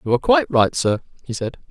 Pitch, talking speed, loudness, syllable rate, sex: 140 Hz, 245 wpm, -19 LUFS, 7.0 syllables/s, male